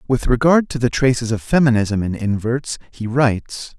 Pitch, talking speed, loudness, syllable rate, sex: 120 Hz, 175 wpm, -18 LUFS, 4.9 syllables/s, male